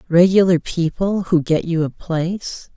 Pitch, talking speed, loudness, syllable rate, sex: 175 Hz, 150 wpm, -18 LUFS, 4.3 syllables/s, female